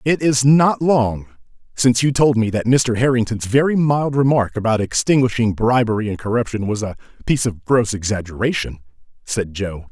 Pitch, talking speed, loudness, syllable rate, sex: 120 Hz, 165 wpm, -18 LUFS, 5.2 syllables/s, male